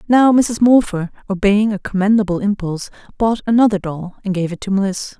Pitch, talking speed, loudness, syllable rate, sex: 205 Hz, 175 wpm, -16 LUFS, 5.4 syllables/s, female